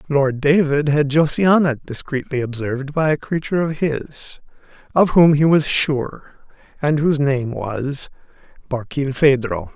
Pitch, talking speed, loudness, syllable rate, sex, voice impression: 140 Hz, 130 wpm, -18 LUFS, 4.3 syllables/s, male, masculine, adult-like, slightly powerful, slightly hard, clear, slightly raspy, cool, calm, friendly, wild, slightly lively, modest